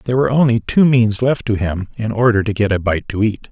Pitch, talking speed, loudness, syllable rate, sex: 110 Hz, 275 wpm, -16 LUFS, 6.1 syllables/s, male